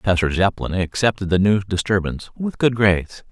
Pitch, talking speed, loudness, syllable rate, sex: 100 Hz, 165 wpm, -20 LUFS, 5.7 syllables/s, male